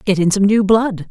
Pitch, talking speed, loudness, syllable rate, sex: 200 Hz, 270 wpm, -14 LUFS, 5.0 syllables/s, female